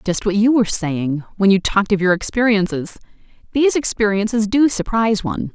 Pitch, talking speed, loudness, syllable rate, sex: 210 Hz, 175 wpm, -17 LUFS, 5.9 syllables/s, female